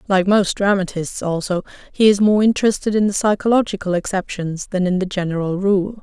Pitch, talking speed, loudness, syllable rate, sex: 195 Hz, 170 wpm, -18 LUFS, 5.7 syllables/s, female